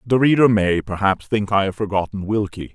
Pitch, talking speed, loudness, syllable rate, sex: 105 Hz, 195 wpm, -19 LUFS, 5.4 syllables/s, male